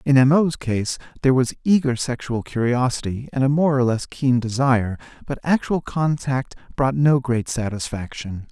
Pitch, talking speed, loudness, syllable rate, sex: 130 Hz, 160 wpm, -21 LUFS, 4.8 syllables/s, male